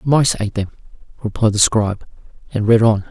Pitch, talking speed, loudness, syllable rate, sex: 110 Hz, 195 wpm, -17 LUFS, 6.3 syllables/s, male